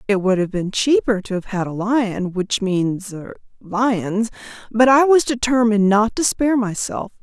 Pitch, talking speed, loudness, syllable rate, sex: 215 Hz, 165 wpm, -18 LUFS, 4.4 syllables/s, female